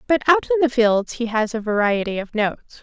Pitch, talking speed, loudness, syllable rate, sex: 230 Hz, 235 wpm, -20 LUFS, 5.6 syllables/s, female